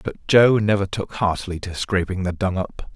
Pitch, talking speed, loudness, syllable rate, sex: 95 Hz, 205 wpm, -21 LUFS, 5.1 syllables/s, male